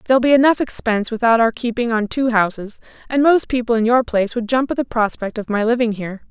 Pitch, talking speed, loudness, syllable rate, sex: 235 Hz, 240 wpm, -17 LUFS, 6.4 syllables/s, female